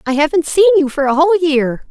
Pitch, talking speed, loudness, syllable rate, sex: 300 Hz, 250 wpm, -13 LUFS, 6.1 syllables/s, female